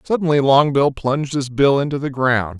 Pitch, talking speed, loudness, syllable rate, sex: 140 Hz, 185 wpm, -17 LUFS, 5.4 syllables/s, male